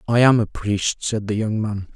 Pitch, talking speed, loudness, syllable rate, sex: 110 Hz, 245 wpm, -20 LUFS, 4.6 syllables/s, male